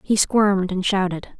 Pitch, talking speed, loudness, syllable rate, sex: 195 Hz, 170 wpm, -20 LUFS, 4.7 syllables/s, female